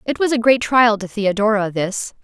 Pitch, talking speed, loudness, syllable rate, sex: 220 Hz, 215 wpm, -17 LUFS, 5.0 syllables/s, female